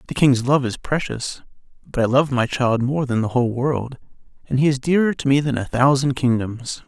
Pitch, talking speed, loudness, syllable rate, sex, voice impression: 130 Hz, 220 wpm, -20 LUFS, 5.2 syllables/s, male, masculine, middle-aged, relaxed, dark, clear, fluent, calm, reassuring, wild, kind, modest